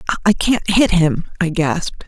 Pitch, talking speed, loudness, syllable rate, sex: 180 Hz, 175 wpm, -17 LUFS, 5.0 syllables/s, female